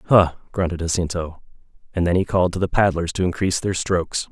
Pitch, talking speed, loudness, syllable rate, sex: 90 Hz, 195 wpm, -21 LUFS, 6.5 syllables/s, male